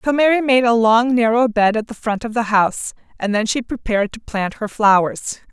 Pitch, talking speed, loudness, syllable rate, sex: 225 Hz, 230 wpm, -17 LUFS, 5.3 syllables/s, female